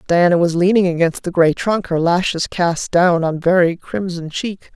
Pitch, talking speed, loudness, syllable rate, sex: 175 Hz, 190 wpm, -17 LUFS, 4.6 syllables/s, female